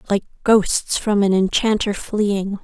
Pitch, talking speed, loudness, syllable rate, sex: 205 Hz, 135 wpm, -18 LUFS, 3.6 syllables/s, female